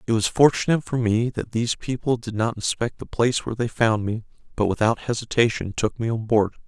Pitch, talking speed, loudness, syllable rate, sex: 115 Hz, 215 wpm, -23 LUFS, 5.9 syllables/s, male